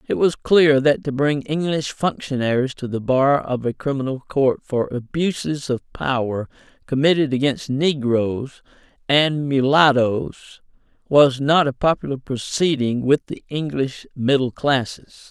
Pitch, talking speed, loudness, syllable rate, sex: 135 Hz, 135 wpm, -20 LUFS, 4.2 syllables/s, male